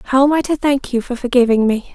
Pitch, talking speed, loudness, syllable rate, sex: 255 Hz, 280 wpm, -16 LUFS, 5.8 syllables/s, female